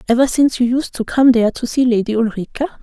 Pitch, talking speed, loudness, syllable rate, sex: 240 Hz, 235 wpm, -16 LUFS, 6.8 syllables/s, female